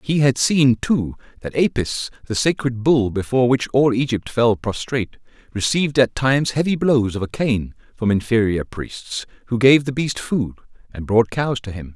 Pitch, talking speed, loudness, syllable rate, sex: 120 Hz, 180 wpm, -19 LUFS, 4.7 syllables/s, male